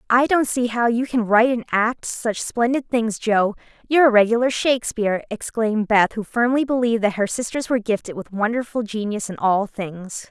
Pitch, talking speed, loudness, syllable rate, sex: 225 Hz, 190 wpm, -20 LUFS, 5.4 syllables/s, female